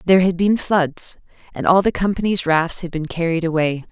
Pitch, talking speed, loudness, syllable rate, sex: 175 Hz, 200 wpm, -19 LUFS, 5.3 syllables/s, female